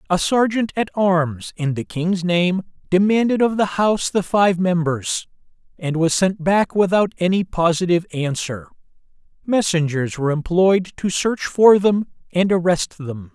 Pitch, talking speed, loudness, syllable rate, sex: 180 Hz, 150 wpm, -19 LUFS, 4.4 syllables/s, male